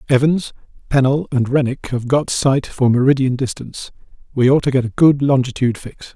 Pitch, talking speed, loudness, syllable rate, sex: 130 Hz, 175 wpm, -17 LUFS, 5.5 syllables/s, male